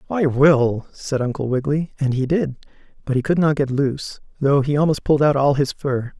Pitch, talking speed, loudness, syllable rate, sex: 140 Hz, 215 wpm, -19 LUFS, 5.4 syllables/s, male